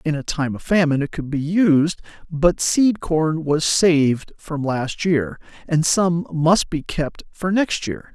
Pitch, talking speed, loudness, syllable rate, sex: 160 Hz, 185 wpm, -20 LUFS, 3.8 syllables/s, male